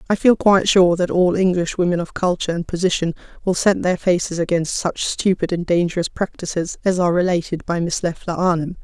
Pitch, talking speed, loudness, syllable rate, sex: 175 Hz, 195 wpm, -19 LUFS, 5.8 syllables/s, female